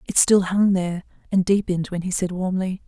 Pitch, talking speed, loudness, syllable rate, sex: 185 Hz, 210 wpm, -21 LUFS, 5.7 syllables/s, female